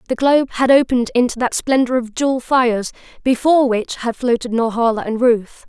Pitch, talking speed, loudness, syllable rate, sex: 245 Hz, 180 wpm, -17 LUFS, 5.8 syllables/s, female